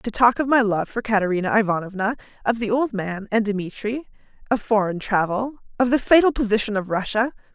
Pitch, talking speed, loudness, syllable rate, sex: 220 Hz, 185 wpm, -21 LUFS, 5.7 syllables/s, female